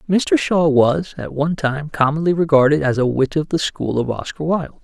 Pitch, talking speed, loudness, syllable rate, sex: 150 Hz, 210 wpm, -18 LUFS, 5.2 syllables/s, male